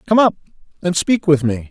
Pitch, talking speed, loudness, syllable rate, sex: 170 Hz, 210 wpm, -17 LUFS, 5.6 syllables/s, male